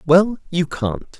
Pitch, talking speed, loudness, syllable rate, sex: 165 Hz, 150 wpm, -20 LUFS, 3.3 syllables/s, male